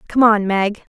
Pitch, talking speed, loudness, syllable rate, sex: 210 Hz, 190 wpm, -16 LUFS, 4.2 syllables/s, female